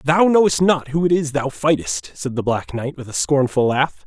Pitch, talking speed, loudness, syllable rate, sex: 145 Hz, 235 wpm, -19 LUFS, 4.8 syllables/s, male